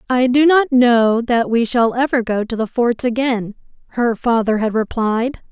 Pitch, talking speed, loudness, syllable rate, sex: 240 Hz, 185 wpm, -16 LUFS, 4.4 syllables/s, female